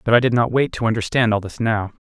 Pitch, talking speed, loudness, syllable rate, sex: 115 Hz, 290 wpm, -19 LUFS, 6.5 syllables/s, male